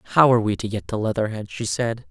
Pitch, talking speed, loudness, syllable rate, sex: 115 Hz, 255 wpm, -22 LUFS, 6.7 syllables/s, male